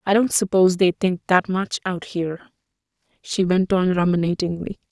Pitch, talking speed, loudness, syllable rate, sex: 185 Hz, 160 wpm, -20 LUFS, 5.2 syllables/s, female